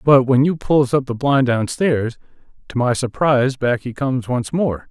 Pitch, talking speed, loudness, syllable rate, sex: 130 Hz, 195 wpm, -18 LUFS, 4.5 syllables/s, male